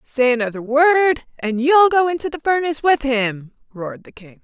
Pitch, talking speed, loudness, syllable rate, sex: 275 Hz, 190 wpm, -17 LUFS, 5.5 syllables/s, female